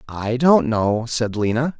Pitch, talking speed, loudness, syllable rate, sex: 120 Hz, 165 wpm, -19 LUFS, 3.7 syllables/s, male